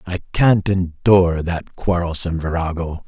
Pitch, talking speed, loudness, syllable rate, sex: 85 Hz, 115 wpm, -19 LUFS, 4.6 syllables/s, male